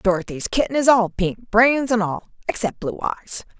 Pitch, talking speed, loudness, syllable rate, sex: 220 Hz, 150 wpm, -20 LUFS, 4.8 syllables/s, female